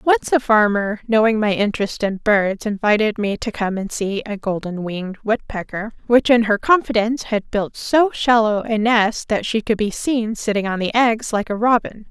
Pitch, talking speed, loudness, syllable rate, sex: 215 Hz, 200 wpm, -19 LUFS, 4.8 syllables/s, female